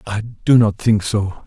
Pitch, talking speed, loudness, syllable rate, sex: 105 Hz, 205 wpm, -17 LUFS, 4.4 syllables/s, male